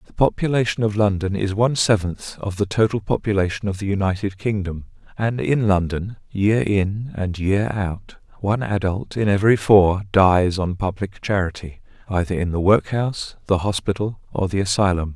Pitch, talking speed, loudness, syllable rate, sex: 100 Hz, 160 wpm, -21 LUFS, 5.1 syllables/s, male